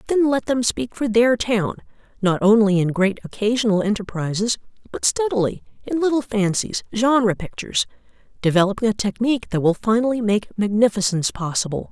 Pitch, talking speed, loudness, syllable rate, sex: 215 Hz, 145 wpm, -20 LUFS, 5.6 syllables/s, female